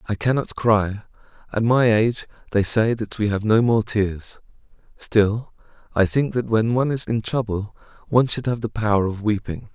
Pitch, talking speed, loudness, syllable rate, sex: 110 Hz, 180 wpm, -21 LUFS, 4.9 syllables/s, male